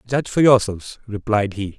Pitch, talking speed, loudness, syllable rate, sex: 110 Hz, 170 wpm, -18 LUFS, 5.3 syllables/s, male